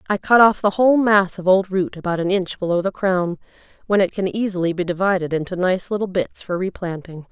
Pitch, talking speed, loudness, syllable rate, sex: 185 Hz, 220 wpm, -19 LUFS, 5.8 syllables/s, female